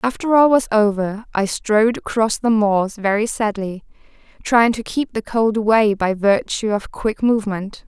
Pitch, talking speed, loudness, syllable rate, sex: 215 Hz, 170 wpm, -18 LUFS, 4.5 syllables/s, female